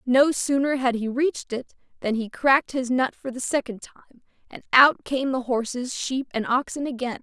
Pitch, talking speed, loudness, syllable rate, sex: 255 Hz, 200 wpm, -23 LUFS, 5.2 syllables/s, female